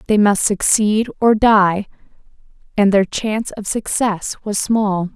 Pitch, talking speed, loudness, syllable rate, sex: 205 Hz, 140 wpm, -16 LUFS, 3.9 syllables/s, female